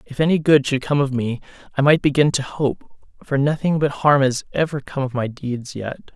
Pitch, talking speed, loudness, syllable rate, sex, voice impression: 140 Hz, 225 wpm, -20 LUFS, 5.0 syllables/s, male, masculine, adult-like, slightly refreshing, friendly, slightly unique